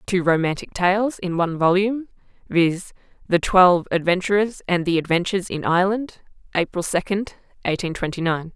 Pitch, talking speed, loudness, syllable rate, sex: 180 Hz, 140 wpm, -21 LUFS, 5.4 syllables/s, female